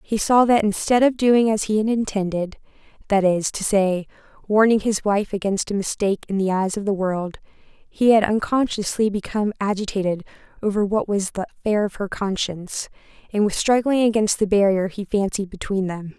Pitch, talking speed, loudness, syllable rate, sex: 205 Hz, 175 wpm, -21 LUFS, 5.3 syllables/s, female